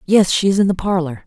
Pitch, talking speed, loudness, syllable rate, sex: 185 Hz, 285 wpm, -16 LUFS, 6.3 syllables/s, female